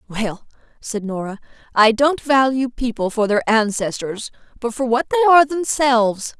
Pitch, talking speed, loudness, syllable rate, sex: 240 Hz, 150 wpm, -18 LUFS, 4.8 syllables/s, female